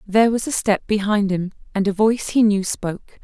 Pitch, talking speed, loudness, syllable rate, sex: 205 Hz, 220 wpm, -20 LUFS, 5.6 syllables/s, female